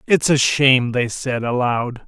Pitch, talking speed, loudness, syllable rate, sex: 130 Hz, 175 wpm, -17 LUFS, 4.2 syllables/s, male